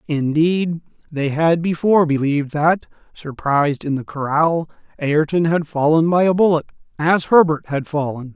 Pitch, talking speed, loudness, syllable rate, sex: 155 Hz, 145 wpm, -18 LUFS, 4.7 syllables/s, male